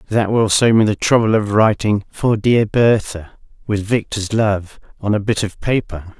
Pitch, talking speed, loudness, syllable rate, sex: 105 Hz, 185 wpm, -16 LUFS, 4.4 syllables/s, male